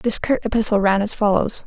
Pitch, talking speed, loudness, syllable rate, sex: 210 Hz, 215 wpm, -18 LUFS, 5.5 syllables/s, female